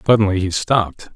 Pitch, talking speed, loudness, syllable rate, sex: 100 Hz, 155 wpm, -17 LUFS, 6.1 syllables/s, male